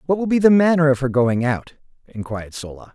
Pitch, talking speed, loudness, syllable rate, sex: 140 Hz, 225 wpm, -18 LUFS, 6.1 syllables/s, male